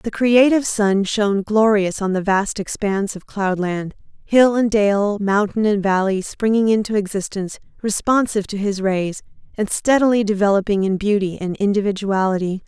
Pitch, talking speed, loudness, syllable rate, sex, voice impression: 205 Hz, 145 wpm, -18 LUFS, 5.0 syllables/s, female, very feminine, very adult-like, thin, tensed, powerful, bright, hard, very clear, fluent, slightly raspy, cute, intellectual, refreshing, very sincere, very calm, friendly, reassuring, unique, very elegant, slightly wild, very sweet, lively, kind, slightly modest